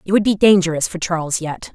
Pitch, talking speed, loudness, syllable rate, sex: 180 Hz, 240 wpm, -17 LUFS, 6.1 syllables/s, female